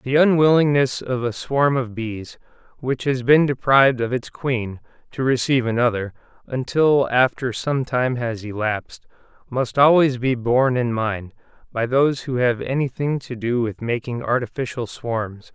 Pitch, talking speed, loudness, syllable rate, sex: 125 Hz, 155 wpm, -20 LUFS, 4.5 syllables/s, male